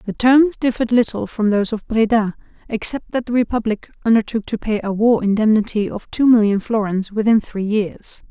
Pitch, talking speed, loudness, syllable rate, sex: 220 Hz, 180 wpm, -18 LUFS, 5.5 syllables/s, female